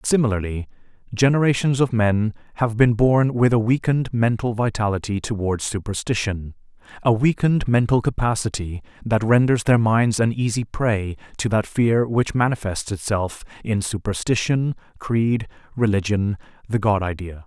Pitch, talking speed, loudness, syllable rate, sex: 110 Hz, 125 wpm, -21 LUFS, 4.8 syllables/s, male